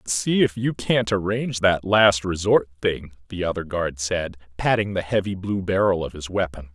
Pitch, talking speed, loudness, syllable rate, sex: 95 Hz, 185 wpm, -22 LUFS, 4.8 syllables/s, male